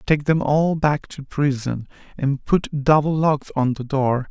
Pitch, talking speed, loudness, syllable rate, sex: 140 Hz, 180 wpm, -21 LUFS, 3.9 syllables/s, male